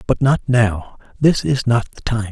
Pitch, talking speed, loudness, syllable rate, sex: 120 Hz, 210 wpm, -17 LUFS, 4.2 syllables/s, male